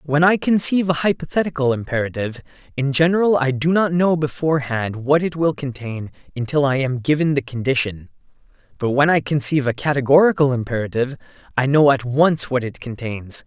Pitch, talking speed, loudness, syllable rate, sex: 140 Hz, 165 wpm, -19 LUFS, 5.8 syllables/s, male